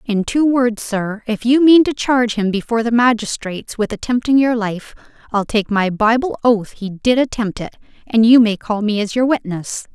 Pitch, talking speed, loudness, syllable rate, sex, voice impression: 230 Hz, 205 wpm, -16 LUFS, 5.1 syllables/s, female, very feminine, young, slightly adult-like, very thin, very tensed, powerful, bright, hard, very clear, fluent, slightly raspy, very cute, intellectual, very refreshing, sincere, slightly calm, friendly, reassuring, very unique, elegant, wild, sweet, strict, slightly intense, sharp, light